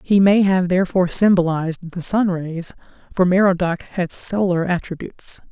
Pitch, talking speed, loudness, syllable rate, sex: 180 Hz, 140 wpm, -18 LUFS, 5.1 syllables/s, female